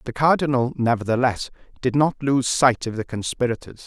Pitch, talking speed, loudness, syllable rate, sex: 125 Hz, 155 wpm, -21 LUFS, 5.3 syllables/s, male